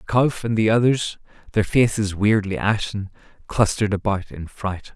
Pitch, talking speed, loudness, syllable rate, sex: 105 Hz, 145 wpm, -21 LUFS, 4.7 syllables/s, male